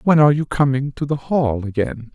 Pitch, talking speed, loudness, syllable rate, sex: 135 Hz, 225 wpm, -19 LUFS, 5.4 syllables/s, male